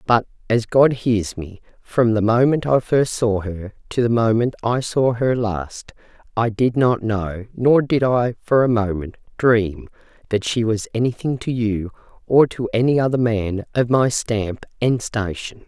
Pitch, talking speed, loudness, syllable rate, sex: 115 Hz, 175 wpm, -19 LUFS, 4.1 syllables/s, female